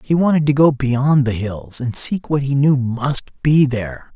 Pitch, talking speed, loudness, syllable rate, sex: 135 Hz, 215 wpm, -17 LUFS, 4.3 syllables/s, male